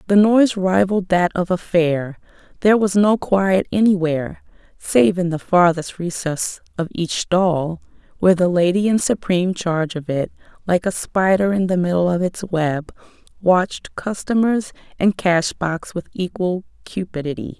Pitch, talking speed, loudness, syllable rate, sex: 180 Hz, 155 wpm, -19 LUFS, 4.6 syllables/s, female